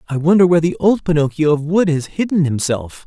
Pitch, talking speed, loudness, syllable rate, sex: 160 Hz, 215 wpm, -16 LUFS, 5.9 syllables/s, male